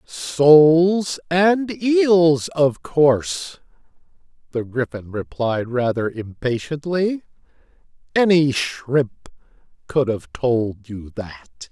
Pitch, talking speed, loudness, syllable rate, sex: 140 Hz, 85 wpm, -19 LUFS, 2.9 syllables/s, male